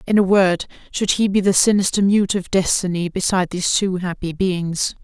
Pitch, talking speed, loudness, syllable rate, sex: 185 Hz, 190 wpm, -18 LUFS, 5.2 syllables/s, female